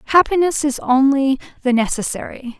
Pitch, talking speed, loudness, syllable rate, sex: 270 Hz, 115 wpm, -17 LUFS, 5.4 syllables/s, female